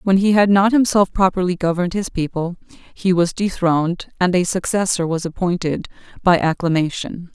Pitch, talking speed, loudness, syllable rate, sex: 180 Hz, 155 wpm, -18 LUFS, 5.2 syllables/s, female